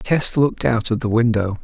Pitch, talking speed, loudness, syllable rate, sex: 115 Hz, 220 wpm, -18 LUFS, 5.1 syllables/s, male